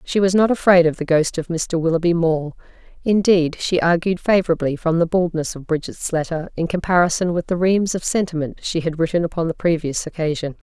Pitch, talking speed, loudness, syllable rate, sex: 170 Hz, 195 wpm, -19 LUFS, 5.7 syllables/s, female